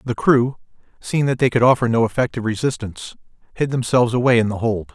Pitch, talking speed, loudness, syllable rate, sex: 120 Hz, 195 wpm, -18 LUFS, 6.5 syllables/s, male